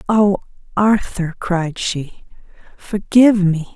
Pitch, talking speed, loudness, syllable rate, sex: 190 Hz, 95 wpm, -17 LUFS, 3.5 syllables/s, female